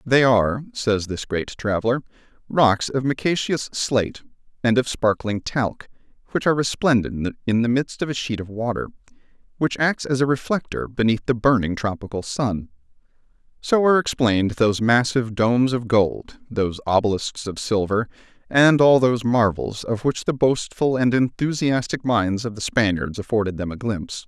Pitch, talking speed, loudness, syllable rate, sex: 115 Hz, 160 wpm, -21 LUFS, 5.1 syllables/s, male